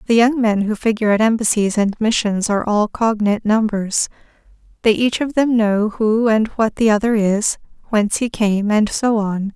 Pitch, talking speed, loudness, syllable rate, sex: 215 Hz, 190 wpm, -17 LUFS, 5.0 syllables/s, female